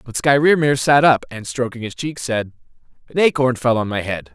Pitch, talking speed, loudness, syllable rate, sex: 125 Hz, 205 wpm, -18 LUFS, 5.0 syllables/s, male